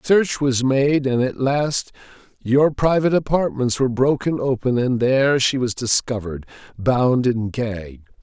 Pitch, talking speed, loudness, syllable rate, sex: 130 Hz, 145 wpm, -19 LUFS, 4.5 syllables/s, male